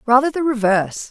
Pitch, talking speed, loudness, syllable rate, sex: 245 Hz, 165 wpm, -17 LUFS, 6.1 syllables/s, female